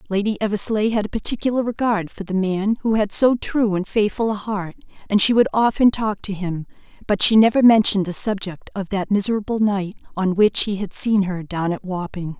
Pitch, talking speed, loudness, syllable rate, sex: 205 Hz, 210 wpm, -19 LUFS, 5.4 syllables/s, female